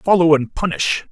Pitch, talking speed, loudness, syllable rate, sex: 165 Hz, 160 wpm, -17 LUFS, 4.9 syllables/s, male